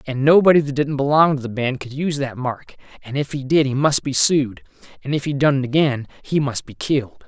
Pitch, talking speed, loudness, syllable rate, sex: 140 Hz, 245 wpm, -19 LUFS, 5.7 syllables/s, male